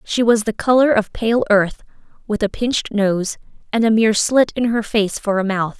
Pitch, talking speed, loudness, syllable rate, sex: 215 Hz, 220 wpm, -17 LUFS, 5.0 syllables/s, female